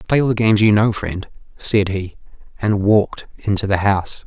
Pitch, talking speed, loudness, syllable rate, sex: 105 Hz, 195 wpm, -18 LUFS, 5.6 syllables/s, male